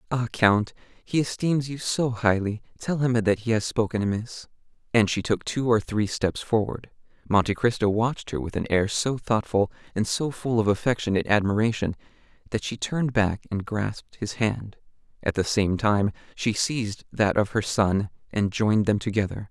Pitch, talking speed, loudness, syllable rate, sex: 110 Hz, 180 wpm, -25 LUFS, 5.0 syllables/s, male